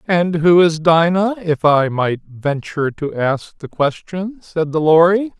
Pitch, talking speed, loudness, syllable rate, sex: 165 Hz, 165 wpm, -16 LUFS, 3.9 syllables/s, male